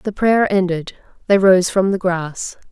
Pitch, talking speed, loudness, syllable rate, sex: 190 Hz, 175 wpm, -16 LUFS, 4.1 syllables/s, female